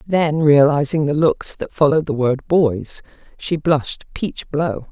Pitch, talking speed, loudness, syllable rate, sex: 150 Hz, 160 wpm, -18 LUFS, 4.1 syllables/s, female